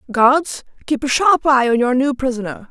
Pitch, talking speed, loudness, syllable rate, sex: 260 Hz, 200 wpm, -16 LUFS, 4.9 syllables/s, female